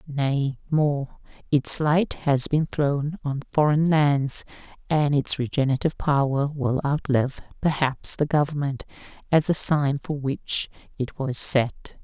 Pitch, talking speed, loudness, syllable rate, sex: 145 Hz, 135 wpm, -23 LUFS, 3.9 syllables/s, female